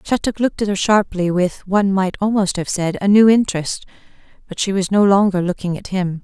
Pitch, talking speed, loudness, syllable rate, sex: 195 Hz, 210 wpm, -17 LUFS, 5.7 syllables/s, female